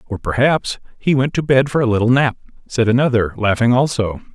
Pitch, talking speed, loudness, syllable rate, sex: 120 Hz, 195 wpm, -17 LUFS, 5.6 syllables/s, male